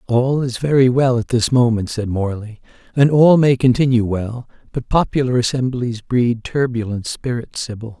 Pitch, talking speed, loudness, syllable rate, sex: 120 Hz, 160 wpm, -17 LUFS, 4.7 syllables/s, male